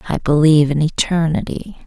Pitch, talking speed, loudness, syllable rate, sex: 155 Hz, 130 wpm, -15 LUFS, 5.6 syllables/s, female